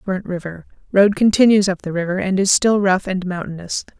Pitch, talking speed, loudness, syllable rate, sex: 190 Hz, 180 wpm, -17 LUFS, 5.4 syllables/s, female